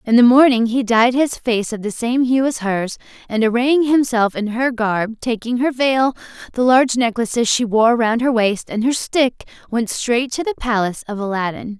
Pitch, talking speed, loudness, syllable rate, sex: 235 Hz, 205 wpm, -17 LUFS, 4.9 syllables/s, female